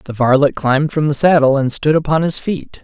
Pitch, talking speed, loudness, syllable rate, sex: 145 Hz, 235 wpm, -14 LUFS, 5.6 syllables/s, male